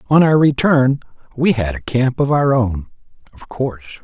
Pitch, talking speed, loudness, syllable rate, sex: 130 Hz, 180 wpm, -16 LUFS, 4.9 syllables/s, male